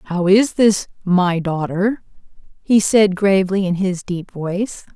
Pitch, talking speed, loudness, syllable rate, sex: 190 Hz, 145 wpm, -17 LUFS, 3.9 syllables/s, female